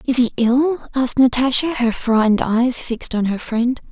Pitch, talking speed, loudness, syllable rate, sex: 245 Hz, 185 wpm, -17 LUFS, 5.1 syllables/s, female